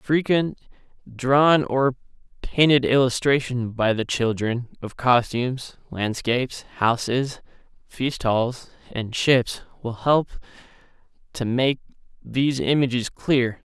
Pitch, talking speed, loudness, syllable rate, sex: 125 Hz, 100 wpm, -22 LUFS, 3.7 syllables/s, male